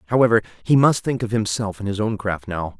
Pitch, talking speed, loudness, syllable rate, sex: 110 Hz, 235 wpm, -20 LUFS, 6.0 syllables/s, male